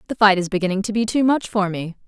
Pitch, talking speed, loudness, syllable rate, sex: 200 Hz, 290 wpm, -20 LUFS, 6.7 syllables/s, female